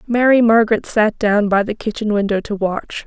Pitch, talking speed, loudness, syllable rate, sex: 215 Hz, 195 wpm, -16 LUFS, 5.1 syllables/s, female